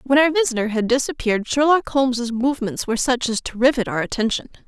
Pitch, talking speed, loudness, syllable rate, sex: 250 Hz, 195 wpm, -20 LUFS, 6.3 syllables/s, female